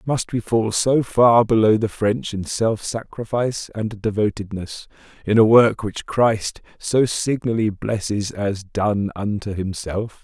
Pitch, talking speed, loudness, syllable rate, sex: 110 Hz, 145 wpm, -20 LUFS, 3.9 syllables/s, male